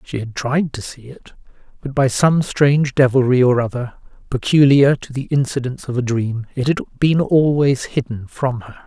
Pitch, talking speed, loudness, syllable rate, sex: 130 Hz, 185 wpm, -17 LUFS, 4.8 syllables/s, male